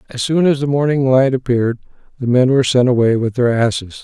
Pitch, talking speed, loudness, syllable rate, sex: 130 Hz, 225 wpm, -15 LUFS, 6.1 syllables/s, male